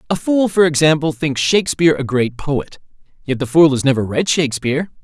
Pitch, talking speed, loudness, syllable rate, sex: 145 Hz, 190 wpm, -16 LUFS, 5.9 syllables/s, male